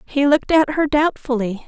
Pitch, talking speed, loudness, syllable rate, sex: 280 Hz, 180 wpm, -18 LUFS, 5.2 syllables/s, female